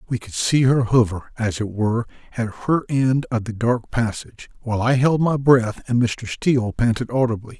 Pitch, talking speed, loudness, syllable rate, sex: 120 Hz, 195 wpm, -20 LUFS, 5.1 syllables/s, male